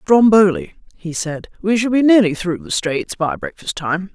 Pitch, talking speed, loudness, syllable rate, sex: 195 Hz, 190 wpm, -17 LUFS, 4.5 syllables/s, female